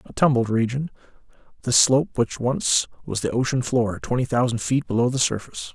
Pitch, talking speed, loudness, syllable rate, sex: 125 Hz, 175 wpm, -22 LUFS, 5.6 syllables/s, male